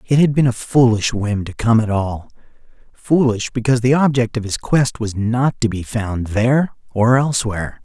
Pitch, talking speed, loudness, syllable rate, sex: 115 Hz, 185 wpm, -17 LUFS, 4.9 syllables/s, male